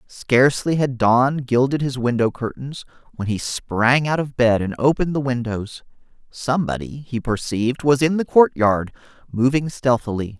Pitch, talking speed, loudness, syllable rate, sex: 125 Hz, 150 wpm, -20 LUFS, 4.8 syllables/s, male